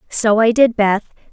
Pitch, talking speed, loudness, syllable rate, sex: 220 Hz, 180 wpm, -15 LUFS, 4.0 syllables/s, female